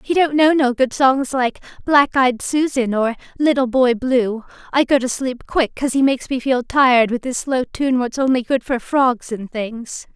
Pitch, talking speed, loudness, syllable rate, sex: 255 Hz, 215 wpm, -18 LUFS, 4.6 syllables/s, female